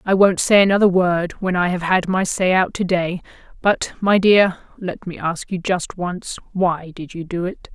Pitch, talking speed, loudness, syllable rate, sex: 180 Hz, 210 wpm, -19 LUFS, 4.4 syllables/s, female